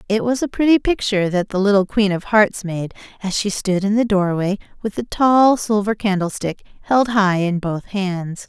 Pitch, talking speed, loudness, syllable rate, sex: 205 Hz, 200 wpm, -18 LUFS, 4.8 syllables/s, female